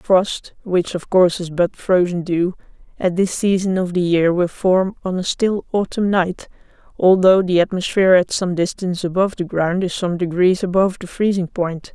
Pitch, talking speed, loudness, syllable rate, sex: 185 Hz, 175 wpm, -18 LUFS, 5.0 syllables/s, female